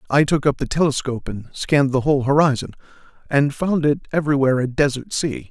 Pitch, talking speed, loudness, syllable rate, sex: 140 Hz, 185 wpm, -19 LUFS, 6.3 syllables/s, male